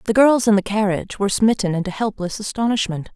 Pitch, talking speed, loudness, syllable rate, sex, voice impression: 205 Hz, 190 wpm, -19 LUFS, 6.4 syllables/s, female, feminine, adult-like, slightly intellectual, slightly calm, slightly elegant